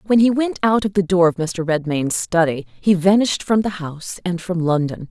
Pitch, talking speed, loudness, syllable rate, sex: 180 Hz, 225 wpm, -19 LUFS, 5.2 syllables/s, female